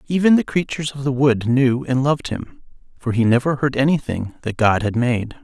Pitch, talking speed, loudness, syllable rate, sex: 130 Hz, 210 wpm, -19 LUFS, 5.4 syllables/s, male